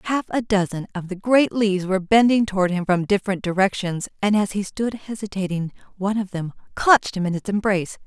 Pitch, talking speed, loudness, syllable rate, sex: 200 Hz, 200 wpm, -21 LUFS, 6.0 syllables/s, female